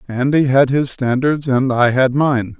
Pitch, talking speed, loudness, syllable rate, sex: 130 Hz, 185 wpm, -15 LUFS, 4.1 syllables/s, male